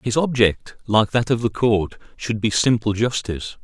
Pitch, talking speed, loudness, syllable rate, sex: 110 Hz, 180 wpm, -20 LUFS, 4.6 syllables/s, male